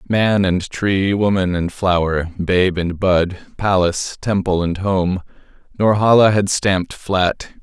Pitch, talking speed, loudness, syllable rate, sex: 95 Hz, 125 wpm, -17 LUFS, 3.9 syllables/s, male